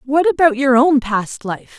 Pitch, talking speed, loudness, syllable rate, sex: 265 Hz, 200 wpm, -15 LUFS, 4.4 syllables/s, female